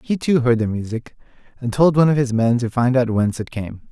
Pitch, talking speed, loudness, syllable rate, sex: 125 Hz, 260 wpm, -19 LUFS, 5.9 syllables/s, male